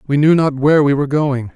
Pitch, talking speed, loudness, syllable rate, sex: 145 Hz, 270 wpm, -14 LUFS, 6.5 syllables/s, male